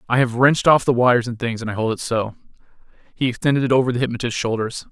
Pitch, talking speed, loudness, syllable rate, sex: 120 Hz, 245 wpm, -19 LUFS, 7.1 syllables/s, male